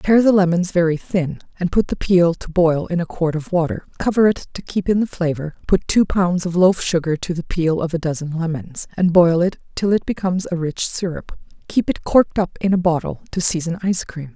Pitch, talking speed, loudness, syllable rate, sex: 175 Hz, 235 wpm, -19 LUFS, 5.4 syllables/s, female